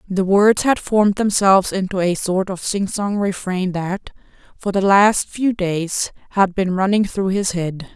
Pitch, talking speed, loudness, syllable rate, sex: 195 Hz, 175 wpm, -18 LUFS, 4.2 syllables/s, female